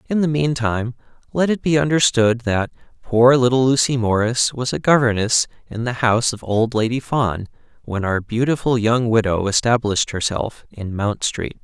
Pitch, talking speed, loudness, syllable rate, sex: 120 Hz, 165 wpm, -18 LUFS, 4.9 syllables/s, male